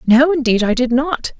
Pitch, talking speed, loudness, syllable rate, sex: 260 Hz, 215 wpm, -15 LUFS, 4.8 syllables/s, female